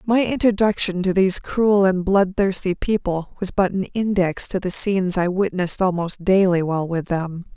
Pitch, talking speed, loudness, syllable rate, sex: 190 Hz, 175 wpm, -20 LUFS, 4.9 syllables/s, female